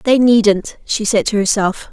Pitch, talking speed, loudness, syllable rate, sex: 215 Hz, 190 wpm, -14 LUFS, 4.1 syllables/s, female